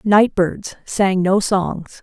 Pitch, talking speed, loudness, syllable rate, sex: 190 Hz, 120 wpm, -17 LUFS, 2.7 syllables/s, female